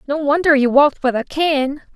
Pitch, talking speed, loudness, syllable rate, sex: 285 Hz, 215 wpm, -16 LUFS, 5.4 syllables/s, female